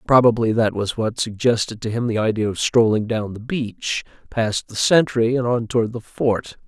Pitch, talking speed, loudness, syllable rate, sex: 115 Hz, 200 wpm, -20 LUFS, 4.9 syllables/s, male